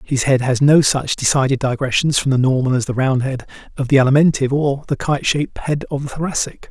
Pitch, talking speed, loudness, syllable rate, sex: 135 Hz, 225 wpm, -17 LUFS, 6.0 syllables/s, male